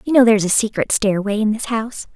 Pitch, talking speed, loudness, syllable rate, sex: 220 Hz, 250 wpm, -17 LUFS, 6.5 syllables/s, female